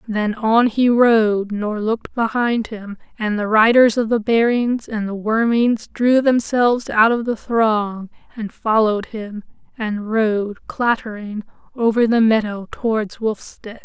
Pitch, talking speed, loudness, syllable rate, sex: 220 Hz, 145 wpm, -18 LUFS, 3.9 syllables/s, female